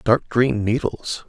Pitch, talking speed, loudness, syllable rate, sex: 115 Hz, 140 wpm, -21 LUFS, 3.4 syllables/s, male